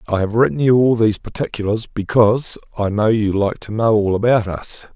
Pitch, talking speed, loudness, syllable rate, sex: 110 Hz, 205 wpm, -17 LUFS, 5.5 syllables/s, male